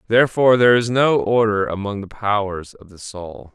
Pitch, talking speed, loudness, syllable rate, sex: 105 Hz, 185 wpm, -17 LUFS, 5.4 syllables/s, male